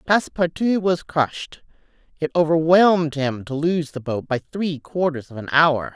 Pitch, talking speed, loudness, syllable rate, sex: 155 Hz, 160 wpm, -20 LUFS, 4.7 syllables/s, female